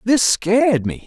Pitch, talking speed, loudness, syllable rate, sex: 210 Hz, 170 wpm, -16 LUFS, 4.1 syllables/s, male